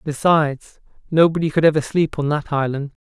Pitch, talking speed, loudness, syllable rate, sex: 150 Hz, 160 wpm, -18 LUFS, 5.5 syllables/s, male